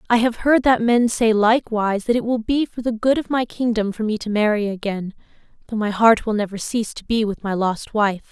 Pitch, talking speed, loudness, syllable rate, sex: 220 Hz, 245 wpm, -20 LUFS, 5.6 syllables/s, female